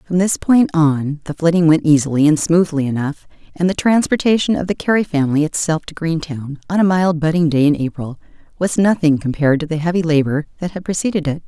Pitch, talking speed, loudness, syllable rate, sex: 165 Hz, 205 wpm, -16 LUFS, 5.9 syllables/s, female